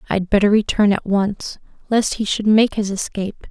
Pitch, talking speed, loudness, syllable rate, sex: 205 Hz, 190 wpm, -18 LUFS, 5.0 syllables/s, female